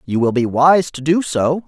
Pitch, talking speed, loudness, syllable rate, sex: 145 Hz, 250 wpm, -16 LUFS, 4.6 syllables/s, male